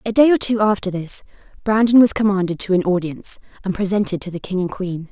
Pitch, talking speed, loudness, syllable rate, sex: 200 Hz, 225 wpm, -18 LUFS, 6.2 syllables/s, female